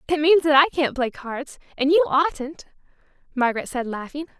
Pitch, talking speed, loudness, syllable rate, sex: 290 Hz, 180 wpm, -21 LUFS, 5.0 syllables/s, female